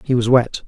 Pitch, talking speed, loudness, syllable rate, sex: 125 Hz, 265 wpm, -16 LUFS, 5.5 syllables/s, male